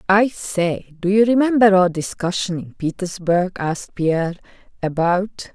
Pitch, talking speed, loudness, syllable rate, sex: 185 Hz, 130 wpm, -19 LUFS, 4.4 syllables/s, female